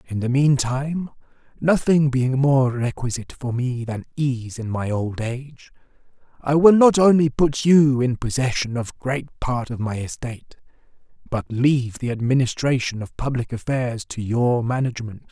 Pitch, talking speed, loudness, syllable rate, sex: 130 Hz, 155 wpm, -21 LUFS, 4.6 syllables/s, male